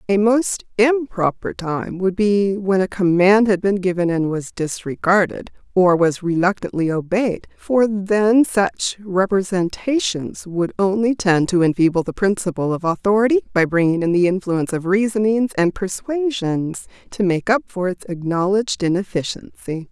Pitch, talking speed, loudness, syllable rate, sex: 190 Hz, 145 wpm, -19 LUFS, 4.5 syllables/s, female